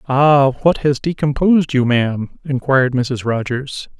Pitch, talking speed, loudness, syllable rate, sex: 135 Hz, 135 wpm, -16 LUFS, 4.5 syllables/s, male